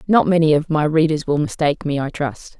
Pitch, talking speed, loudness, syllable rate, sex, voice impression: 155 Hz, 230 wpm, -18 LUFS, 5.7 syllables/s, female, feminine, gender-neutral, very adult-like, middle-aged, slightly thin, slightly tensed, slightly weak, slightly bright, hard, very clear, fluent, cool, intellectual, slightly refreshing, sincere, calm, friendly, reassuring, slightly unique, elegant, slightly wild, lively, strict, slightly modest